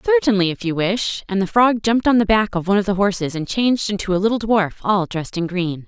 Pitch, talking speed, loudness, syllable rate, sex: 200 Hz, 265 wpm, -19 LUFS, 6.4 syllables/s, female